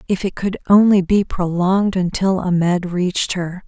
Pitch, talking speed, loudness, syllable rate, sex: 185 Hz, 165 wpm, -17 LUFS, 4.7 syllables/s, female